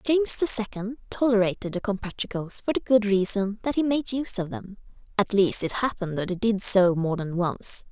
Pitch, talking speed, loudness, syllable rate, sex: 210 Hz, 205 wpm, -24 LUFS, 5.4 syllables/s, female